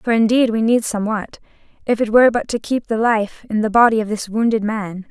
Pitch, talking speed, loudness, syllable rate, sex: 220 Hz, 235 wpm, -17 LUFS, 5.7 syllables/s, female